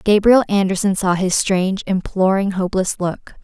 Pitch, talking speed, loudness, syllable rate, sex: 195 Hz, 140 wpm, -17 LUFS, 5.0 syllables/s, female